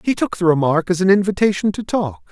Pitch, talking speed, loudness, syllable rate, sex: 180 Hz, 235 wpm, -17 LUFS, 6.0 syllables/s, male